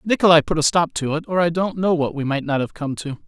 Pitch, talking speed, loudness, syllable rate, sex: 160 Hz, 310 wpm, -20 LUFS, 6.0 syllables/s, male